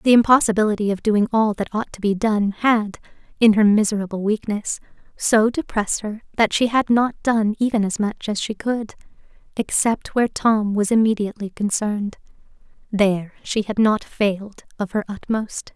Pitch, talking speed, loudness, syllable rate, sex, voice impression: 215 Hz, 160 wpm, -20 LUFS, 5.1 syllables/s, female, feminine, adult-like, slightly cute, calm